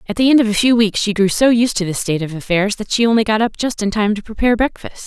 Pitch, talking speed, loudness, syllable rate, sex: 215 Hz, 320 wpm, -16 LUFS, 6.7 syllables/s, female